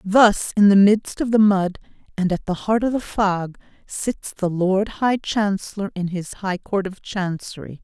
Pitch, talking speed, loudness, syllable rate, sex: 195 Hz, 190 wpm, -20 LUFS, 4.2 syllables/s, female